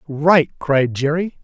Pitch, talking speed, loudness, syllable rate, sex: 150 Hz, 125 wpm, -17 LUFS, 3.4 syllables/s, male